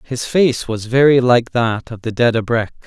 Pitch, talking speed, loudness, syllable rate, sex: 120 Hz, 210 wpm, -16 LUFS, 4.5 syllables/s, male